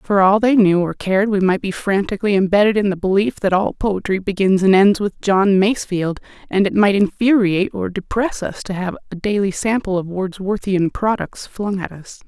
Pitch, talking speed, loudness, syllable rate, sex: 195 Hz, 200 wpm, -17 LUFS, 5.2 syllables/s, female